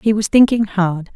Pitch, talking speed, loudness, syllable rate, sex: 205 Hz, 210 wpm, -15 LUFS, 4.5 syllables/s, female